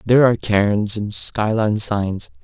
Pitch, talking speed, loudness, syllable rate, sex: 105 Hz, 150 wpm, -18 LUFS, 4.5 syllables/s, male